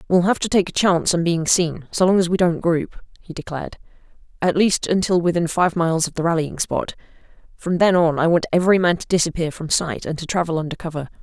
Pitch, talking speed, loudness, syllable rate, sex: 170 Hz, 230 wpm, -19 LUFS, 6.0 syllables/s, female